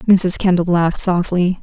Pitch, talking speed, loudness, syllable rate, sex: 180 Hz, 150 wpm, -15 LUFS, 4.6 syllables/s, female